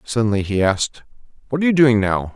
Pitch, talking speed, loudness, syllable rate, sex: 115 Hz, 205 wpm, -18 LUFS, 6.8 syllables/s, male